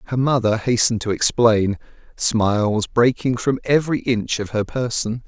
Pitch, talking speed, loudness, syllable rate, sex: 115 Hz, 150 wpm, -19 LUFS, 4.8 syllables/s, male